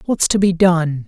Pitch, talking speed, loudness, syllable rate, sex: 175 Hz, 225 wpm, -15 LUFS, 4.3 syllables/s, male